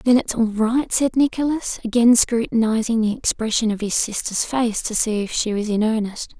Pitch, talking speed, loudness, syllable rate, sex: 225 Hz, 195 wpm, -20 LUFS, 5.0 syllables/s, female